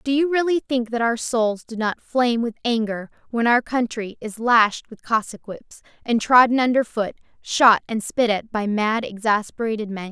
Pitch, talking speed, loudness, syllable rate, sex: 230 Hz, 190 wpm, -21 LUFS, 4.7 syllables/s, female